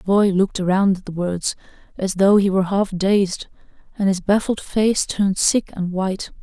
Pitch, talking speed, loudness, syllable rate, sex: 195 Hz, 195 wpm, -19 LUFS, 5.0 syllables/s, female